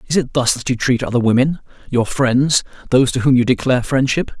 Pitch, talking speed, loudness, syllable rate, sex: 125 Hz, 205 wpm, -16 LUFS, 6.1 syllables/s, male